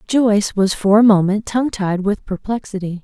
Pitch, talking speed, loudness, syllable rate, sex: 205 Hz, 180 wpm, -17 LUFS, 5.2 syllables/s, female